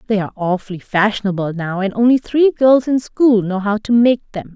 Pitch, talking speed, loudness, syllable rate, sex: 215 Hz, 210 wpm, -16 LUFS, 5.5 syllables/s, female